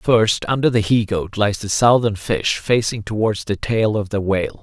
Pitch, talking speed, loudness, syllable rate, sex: 105 Hz, 210 wpm, -18 LUFS, 4.6 syllables/s, male